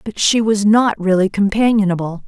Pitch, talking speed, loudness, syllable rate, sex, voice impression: 205 Hz, 160 wpm, -15 LUFS, 5.1 syllables/s, female, very feminine, young, thin, tensed, very powerful, bright, slightly hard, clear, fluent, cute, intellectual, very refreshing, sincere, calm, friendly, reassuring, slightly unique, elegant, slightly wild, sweet, lively, strict, slightly intense, slightly sharp